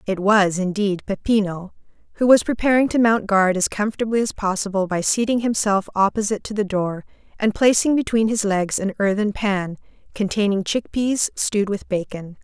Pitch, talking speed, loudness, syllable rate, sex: 205 Hz, 170 wpm, -20 LUFS, 5.3 syllables/s, female